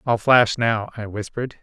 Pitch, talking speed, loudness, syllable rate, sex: 115 Hz, 185 wpm, -20 LUFS, 4.9 syllables/s, male